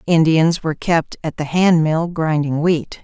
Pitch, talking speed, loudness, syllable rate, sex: 160 Hz, 160 wpm, -17 LUFS, 4.2 syllables/s, female